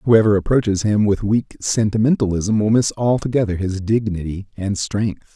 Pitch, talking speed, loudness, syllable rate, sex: 105 Hz, 145 wpm, -19 LUFS, 4.8 syllables/s, male